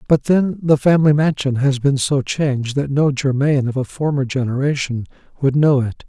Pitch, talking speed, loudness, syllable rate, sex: 140 Hz, 190 wpm, -17 LUFS, 5.1 syllables/s, male